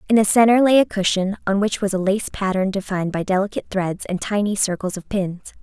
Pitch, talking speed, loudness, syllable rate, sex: 200 Hz, 225 wpm, -20 LUFS, 5.9 syllables/s, female